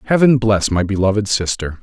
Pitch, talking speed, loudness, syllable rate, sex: 105 Hz, 165 wpm, -16 LUFS, 5.6 syllables/s, male